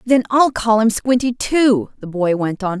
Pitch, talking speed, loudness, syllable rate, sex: 225 Hz, 215 wpm, -16 LUFS, 4.3 syllables/s, female